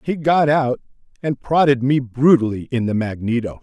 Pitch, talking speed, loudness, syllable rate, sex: 130 Hz, 165 wpm, -18 LUFS, 4.8 syllables/s, male